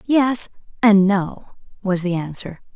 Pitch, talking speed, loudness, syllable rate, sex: 200 Hz, 130 wpm, -19 LUFS, 3.9 syllables/s, female